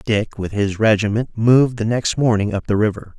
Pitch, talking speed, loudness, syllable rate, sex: 110 Hz, 205 wpm, -18 LUFS, 5.3 syllables/s, male